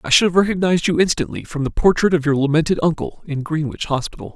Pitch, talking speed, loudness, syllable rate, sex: 160 Hz, 220 wpm, -18 LUFS, 6.7 syllables/s, male